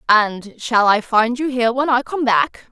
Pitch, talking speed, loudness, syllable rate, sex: 240 Hz, 220 wpm, -17 LUFS, 4.4 syllables/s, female